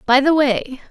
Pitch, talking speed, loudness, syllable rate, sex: 275 Hz, 200 wpm, -16 LUFS, 4.5 syllables/s, female